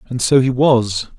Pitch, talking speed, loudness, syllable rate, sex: 125 Hz, 200 wpm, -15 LUFS, 3.9 syllables/s, male